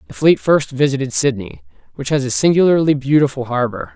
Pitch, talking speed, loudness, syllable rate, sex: 140 Hz, 165 wpm, -16 LUFS, 5.8 syllables/s, male